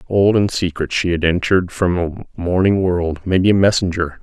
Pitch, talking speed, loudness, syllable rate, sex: 90 Hz, 185 wpm, -17 LUFS, 5.0 syllables/s, male